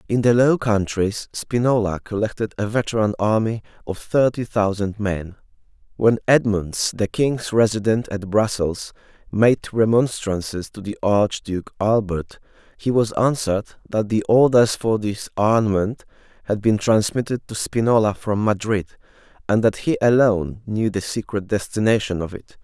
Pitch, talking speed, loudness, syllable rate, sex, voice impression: 105 Hz, 140 wpm, -20 LUFS, 4.7 syllables/s, male, masculine, adult-like, tensed, slightly powerful, slightly muffled, cool, intellectual, sincere, calm, friendly, reassuring, slightly lively, slightly kind, slightly modest